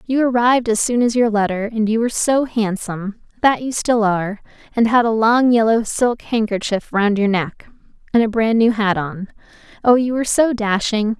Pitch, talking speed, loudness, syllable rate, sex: 225 Hz, 190 wpm, -17 LUFS, 5.1 syllables/s, female